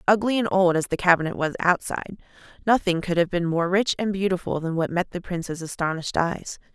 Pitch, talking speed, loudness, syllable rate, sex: 180 Hz, 205 wpm, -23 LUFS, 6.0 syllables/s, female